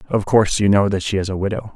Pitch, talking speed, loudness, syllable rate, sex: 100 Hz, 310 wpm, -18 LUFS, 7.0 syllables/s, male